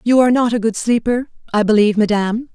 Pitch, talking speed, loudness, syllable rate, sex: 225 Hz, 210 wpm, -16 LUFS, 6.8 syllables/s, female